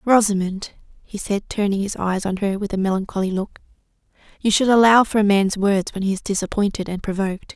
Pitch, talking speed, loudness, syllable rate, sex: 200 Hz, 200 wpm, -20 LUFS, 5.8 syllables/s, female